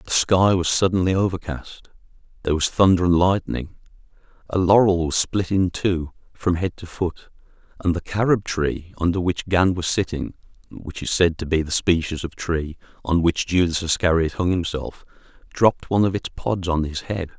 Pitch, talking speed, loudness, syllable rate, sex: 90 Hz, 180 wpm, -21 LUFS, 5.0 syllables/s, male